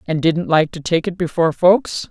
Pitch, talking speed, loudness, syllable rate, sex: 170 Hz, 230 wpm, -17 LUFS, 5.1 syllables/s, female